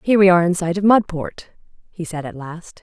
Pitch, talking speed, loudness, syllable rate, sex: 175 Hz, 235 wpm, -17 LUFS, 5.9 syllables/s, female